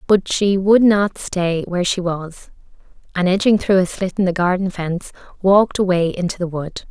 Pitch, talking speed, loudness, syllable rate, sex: 185 Hz, 190 wpm, -18 LUFS, 5.0 syllables/s, female